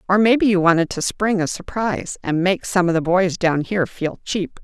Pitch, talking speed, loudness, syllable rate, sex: 190 Hz, 235 wpm, -19 LUFS, 5.3 syllables/s, female